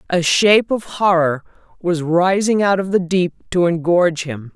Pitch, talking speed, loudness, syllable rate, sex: 180 Hz, 170 wpm, -17 LUFS, 4.5 syllables/s, female